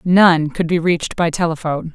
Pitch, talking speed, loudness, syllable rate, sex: 165 Hz, 185 wpm, -17 LUFS, 5.4 syllables/s, female